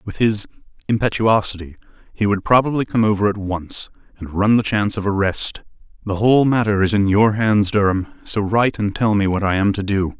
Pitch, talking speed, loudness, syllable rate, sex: 105 Hz, 200 wpm, -18 LUFS, 5.6 syllables/s, male